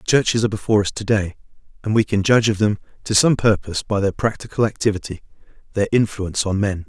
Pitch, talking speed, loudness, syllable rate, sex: 105 Hz, 210 wpm, -19 LUFS, 6.8 syllables/s, male